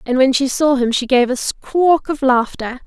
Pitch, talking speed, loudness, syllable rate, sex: 265 Hz, 230 wpm, -16 LUFS, 4.4 syllables/s, female